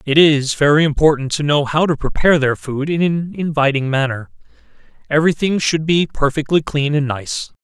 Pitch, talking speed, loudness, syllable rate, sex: 150 Hz, 180 wpm, -16 LUFS, 5.3 syllables/s, male